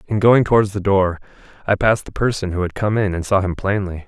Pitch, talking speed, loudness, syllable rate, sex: 100 Hz, 250 wpm, -18 LUFS, 6.1 syllables/s, male